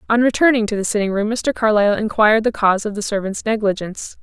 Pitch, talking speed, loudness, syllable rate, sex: 215 Hz, 215 wpm, -17 LUFS, 6.7 syllables/s, female